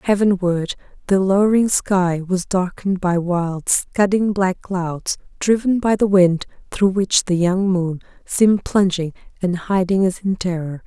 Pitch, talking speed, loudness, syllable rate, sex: 185 Hz, 150 wpm, -18 LUFS, 4.2 syllables/s, female